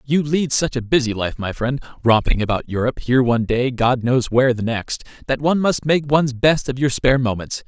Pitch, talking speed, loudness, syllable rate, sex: 125 Hz, 225 wpm, -19 LUFS, 5.8 syllables/s, male